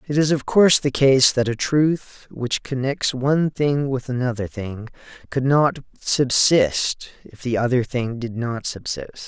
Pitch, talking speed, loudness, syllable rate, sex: 130 Hz, 170 wpm, -20 LUFS, 4.1 syllables/s, male